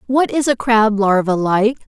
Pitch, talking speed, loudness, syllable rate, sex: 225 Hz, 185 wpm, -15 LUFS, 4.4 syllables/s, female